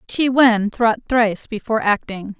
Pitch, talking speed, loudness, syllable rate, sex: 225 Hz, 150 wpm, -17 LUFS, 5.2 syllables/s, female